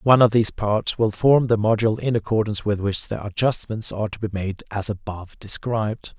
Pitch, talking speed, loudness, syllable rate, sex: 105 Hz, 205 wpm, -22 LUFS, 5.9 syllables/s, male